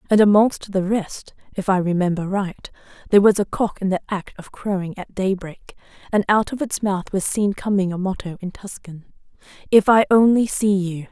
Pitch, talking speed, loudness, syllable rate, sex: 195 Hz, 195 wpm, -20 LUFS, 5.1 syllables/s, female